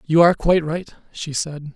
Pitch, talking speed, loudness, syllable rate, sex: 160 Hz, 205 wpm, -20 LUFS, 5.9 syllables/s, male